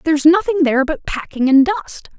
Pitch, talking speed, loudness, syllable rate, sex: 310 Hz, 190 wpm, -15 LUFS, 5.5 syllables/s, female